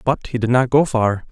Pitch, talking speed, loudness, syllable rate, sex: 125 Hz, 275 wpm, -17 LUFS, 5.0 syllables/s, male